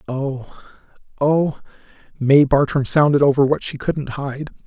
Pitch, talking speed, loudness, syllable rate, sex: 140 Hz, 130 wpm, -18 LUFS, 4.1 syllables/s, male